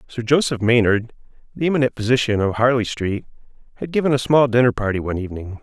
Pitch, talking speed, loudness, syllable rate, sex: 120 Hz, 180 wpm, -19 LUFS, 6.6 syllables/s, male